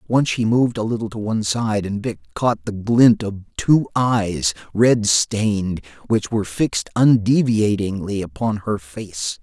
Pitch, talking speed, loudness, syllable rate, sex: 105 Hz, 160 wpm, -19 LUFS, 4.3 syllables/s, male